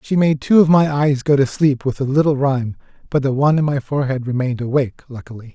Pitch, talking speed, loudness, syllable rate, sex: 140 Hz, 240 wpm, -17 LUFS, 6.5 syllables/s, male